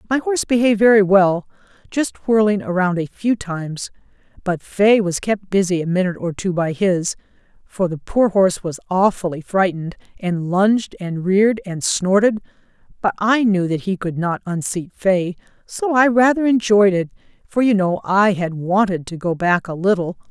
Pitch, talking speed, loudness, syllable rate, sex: 190 Hz, 170 wpm, -18 LUFS, 4.9 syllables/s, female